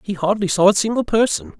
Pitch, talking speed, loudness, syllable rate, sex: 190 Hz, 225 wpm, -17 LUFS, 6.1 syllables/s, male